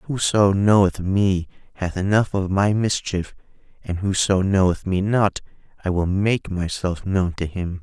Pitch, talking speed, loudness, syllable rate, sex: 95 Hz, 155 wpm, -21 LUFS, 4.1 syllables/s, male